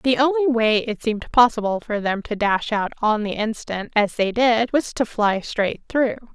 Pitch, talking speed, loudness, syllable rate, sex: 225 Hz, 210 wpm, -21 LUFS, 4.5 syllables/s, female